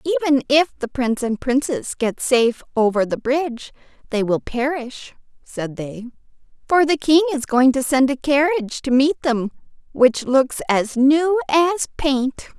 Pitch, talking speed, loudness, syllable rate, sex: 270 Hz, 160 wpm, -19 LUFS, 4.6 syllables/s, female